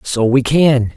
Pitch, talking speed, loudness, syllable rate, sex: 130 Hz, 190 wpm, -13 LUFS, 3.5 syllables/s, male